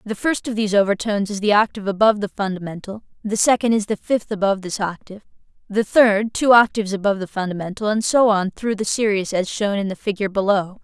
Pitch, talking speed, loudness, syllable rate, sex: 205 Hz, 210 wpm, -19 LUFS, 6.5 syllables/s, female